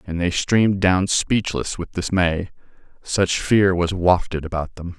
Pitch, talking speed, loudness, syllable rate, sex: 90 Hz, 155 wpm, -20 LUFS, 4.2 syllables/s, male